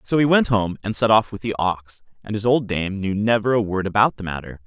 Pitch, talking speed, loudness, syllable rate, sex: 105 Hz, 270 wpm, -20 LUFS, 5.6 syllables/s, male